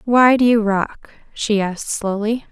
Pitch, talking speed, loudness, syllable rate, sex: 220 Hz, 165 wpm, -17 LUFS, 4.3 syllables/s, female